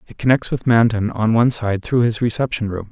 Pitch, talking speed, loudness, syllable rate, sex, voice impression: 115 Hz, 225 wpm, -18 LUFS, 5.8 syllables/s, male, masculine, adult-like, relaxed, weak, soft, raspy, calm, slightly friendly, wild, kind, modest